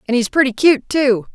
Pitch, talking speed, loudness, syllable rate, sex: 260 Hz, 225 wpm, -15 LUFS, 5.5 syllables/s, female